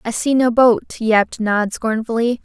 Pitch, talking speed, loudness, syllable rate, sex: 230 Hz, 170 wpm, -17 LUFS, 4.4 syllables/s, female